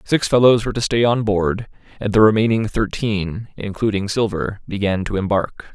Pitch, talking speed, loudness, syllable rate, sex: 105 Hz, 165 wpm, -19 LUFS, 5.1 syllables/s, male